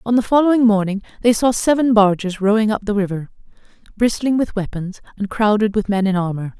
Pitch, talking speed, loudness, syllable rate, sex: 210 Hz, 190 wpm, -17 LUFS, 5.8 syllables/s, female